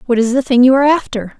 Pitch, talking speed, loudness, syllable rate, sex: 250 Hz, 300 wpm, -12 LUFS, 7.3 syllables/s, female